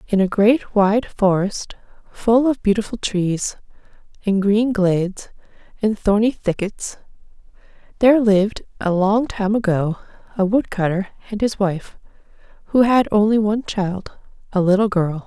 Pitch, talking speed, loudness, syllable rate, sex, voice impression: 205 Hz, 140 wpm, -19 LUFS, 4.5 syllables/s, female, feminine, slightly young, adult-like, thin, slightly tensed, slightly weak, bright, slightly soft, clear, fluent, slightly cute, very intellectual, refreshing, sincere, calm, friendly, very reassuring, elegant, slightly sweet, very kind, slightly modest